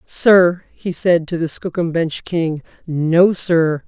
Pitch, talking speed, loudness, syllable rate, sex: 170 Hz, 155 wpm, -17 LUFS, 3.1 syllables/s, female